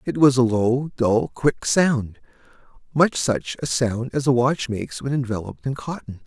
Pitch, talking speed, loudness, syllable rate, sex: 125 Hz, 170 wpm, -21 LUFS, 4.6 syllables/s, male